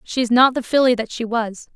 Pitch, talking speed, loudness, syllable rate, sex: 240 Hz, 275 wpm, -18 LUFS, 5.5 syllables/s, female